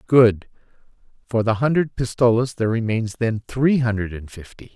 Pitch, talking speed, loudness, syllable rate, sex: 115 Hz, 150 wpm, -20 LUFS, 5.0 syllables/s, male